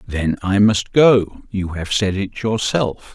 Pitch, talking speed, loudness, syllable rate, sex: 100 Hz, 155 wpm, -18 LUFS, 3.4 syllables/s, male